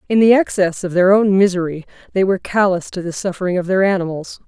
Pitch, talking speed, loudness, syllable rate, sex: 185 Hz, 215 wpm, -16 LUFS, 6.3 syllables/s, female